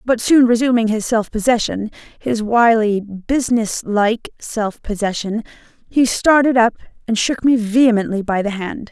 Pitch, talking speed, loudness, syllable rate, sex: 225 Hz, 135 wpm, -17 LUFS, 4.5 syllables/s, female